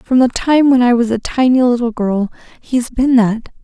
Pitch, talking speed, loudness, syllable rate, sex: 245 Hz, 230 wpm, -14 LUFS, 5.0 syllables/s, female